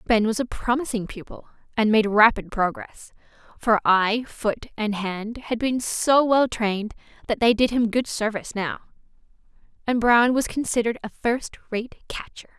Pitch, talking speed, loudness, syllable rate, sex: 225 Hz, 160 wpm, -23 LUFS, 4.7 syllables/s, female